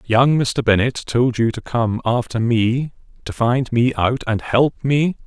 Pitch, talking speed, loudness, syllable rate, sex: 120 Hz, 180 wpm, -18 LUFS, 3.9 syllables/s, male